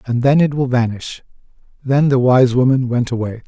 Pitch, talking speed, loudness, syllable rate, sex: 125 Hz, 190 wpm, -15 LUFS, 5.1 syllables/s, male